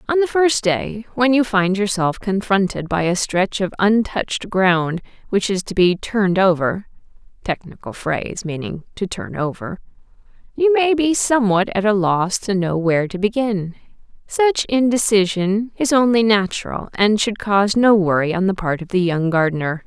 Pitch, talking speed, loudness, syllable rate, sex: 200 Hz, 170 wpm, -18 LUFS, 4.3 syllables/s, female